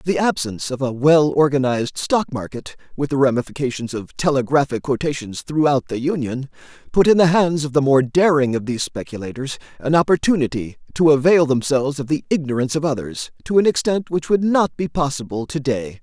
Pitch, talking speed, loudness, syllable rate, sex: 140 Hz, 180 wpm, -19 LUFS, 5.7 syllables/s, male